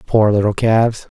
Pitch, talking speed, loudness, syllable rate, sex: 110 Hz, 150 wpm, -15 LUFS, 5.2 syllables/s, male